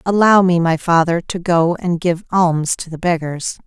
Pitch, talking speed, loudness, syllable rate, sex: 170 Hz, 195 wpm, -16 LUFS, 4.4 syllables/s, female